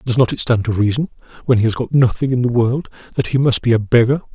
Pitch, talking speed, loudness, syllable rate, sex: 120 Hz, 275 wpm, -17 LUFS, 6.5 syllables/s, male